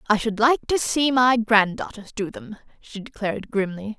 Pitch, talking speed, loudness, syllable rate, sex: 220 Hz, 180 wpm, -22 LUFS, 4.9 syllables/s, female